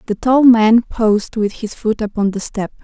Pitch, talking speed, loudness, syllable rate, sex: 220 Hz, 210 wpm, -15 LUFS, 4.7 syllables/s, female